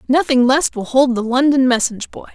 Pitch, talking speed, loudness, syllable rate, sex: 260 Hz, 205 wpm, -15 LUFS, 5.6 syllables/s, female